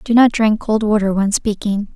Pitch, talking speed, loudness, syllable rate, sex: 215 Hz, 215 wpm, -16 LUFS, 4.9 syllables/s, female